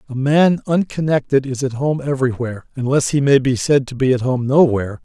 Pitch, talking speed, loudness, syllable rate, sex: 135 Hz, 225 wpm, -17 LUFS, 5.8 syllables/s, male